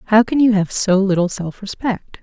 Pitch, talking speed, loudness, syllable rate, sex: 205 Hz, 215 wpm, -17 LUFS, 5.0 syllables/s, female